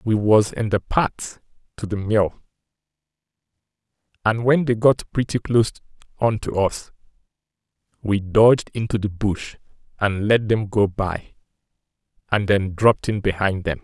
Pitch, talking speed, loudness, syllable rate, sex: 105 Hz, 145 wpm, -20 LUFS, 4.5 syllables/s, male